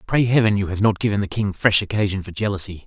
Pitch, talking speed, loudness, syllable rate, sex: 100 Hz, 250 wpm, -20 LUFS, 6.6 syllables/s, male